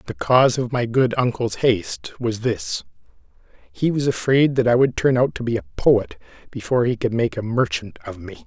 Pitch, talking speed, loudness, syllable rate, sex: 120 Hz, 200 wpm, -20 LUFS, 5.3 syllables/s, male